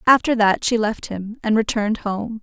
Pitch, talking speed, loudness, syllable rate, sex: 220 Hz, 200 wpm, -20 LUFS, 4.8 syllables/s, female